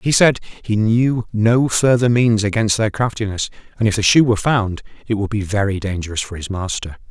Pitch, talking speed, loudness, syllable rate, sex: 110 Hz, 205 wpm, -18 LUFS, 5.3 syllables/s, male